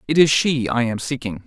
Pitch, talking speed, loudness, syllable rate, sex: 130 Hz, 245 wpm, -19 LUFS, 5.3 syllables/s, male